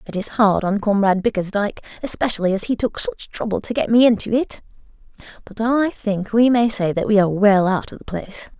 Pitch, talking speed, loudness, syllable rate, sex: 215 Hz, 215 wpm, -19 LUFS, 5.8 syllables/s, female